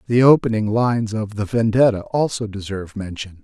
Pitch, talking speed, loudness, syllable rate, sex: 110 Hz, 155 wpm, -19 LUFS, 5.5 syllables/s, male